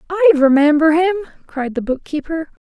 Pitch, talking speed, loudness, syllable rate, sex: 315 Hz, 135 wpm, -16 LUFS, 5.4 syllables/s, female